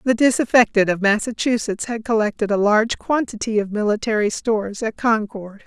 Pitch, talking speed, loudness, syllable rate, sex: 220 Hz, 150 wpm, -19 LUFS, 5.4 syllables/s, female